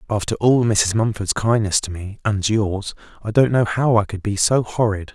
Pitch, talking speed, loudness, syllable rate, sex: 105 Hz, 210 wpm, -19 LUFS, 4.8 syllables/s, male